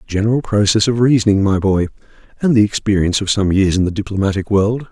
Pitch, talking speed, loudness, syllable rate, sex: 105 Hz, 195 wpm, -15 LUFS, 6.4 syllables/s, male